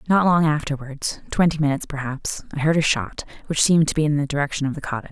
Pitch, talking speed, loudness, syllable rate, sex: 150 Hz, 210 wpm, -21 LUFS, 6.9 syllables/s, female